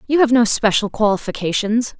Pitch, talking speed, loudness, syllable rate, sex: 225 Hz, 150 wpm, -17 LUFS, 5.6 syllables/s, female